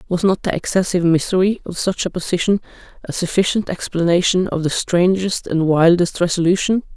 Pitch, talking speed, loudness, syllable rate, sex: 180 Hz, 155 wpm, -18 LUFS, 5.6 syllables/s, female